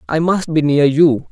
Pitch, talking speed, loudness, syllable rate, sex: 155 Hz, 230 wpm, -14 LUFS, 4.4 syllables/s, male